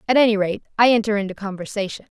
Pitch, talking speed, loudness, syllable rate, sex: 210 Hz, 190 wpm, -20 LUFS, 7.2 syllables/s, female